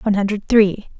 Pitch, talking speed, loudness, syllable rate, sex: 205 Hz, 180 wpm, -17 LUFS, 6.0 syllables/s, female